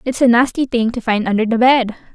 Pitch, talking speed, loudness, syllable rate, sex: 235 Hz, 250 wpm, -15 LUFS, 6.0 syllables/s, female